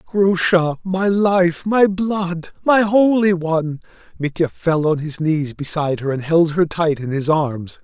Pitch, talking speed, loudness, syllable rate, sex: 170 Hz, 170 wpm, -18 LUFS, 3.9 syllables/s, male